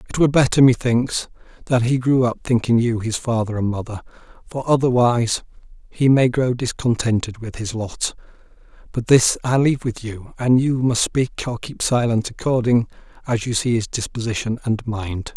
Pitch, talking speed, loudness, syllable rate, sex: 120 Hz, 170 wpm, -19 LUFS, 5.0 syllables/s, male